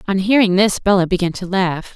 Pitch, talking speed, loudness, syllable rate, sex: 190 Hz, 215 wpm, -16 LUFS, 5.6 syllables/s, female